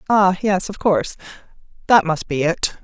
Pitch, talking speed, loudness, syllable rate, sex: 185 Hz, 170 wpm, -18 LUFS, 4.8 syllables/s, female